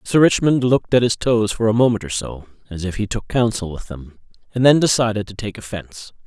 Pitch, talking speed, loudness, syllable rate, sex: 110 Hz, 230 wpm, -18 LUFS, 5.8 syllables/s, male